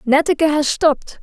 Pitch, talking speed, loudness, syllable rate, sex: 300 Hz, 145 wpm, -16 LUFS, 5.4 syllables/s, female